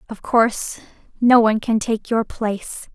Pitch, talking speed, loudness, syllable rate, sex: 225 Hz, 165 wpm, -19 LUFS, 4.7 syllables/s, female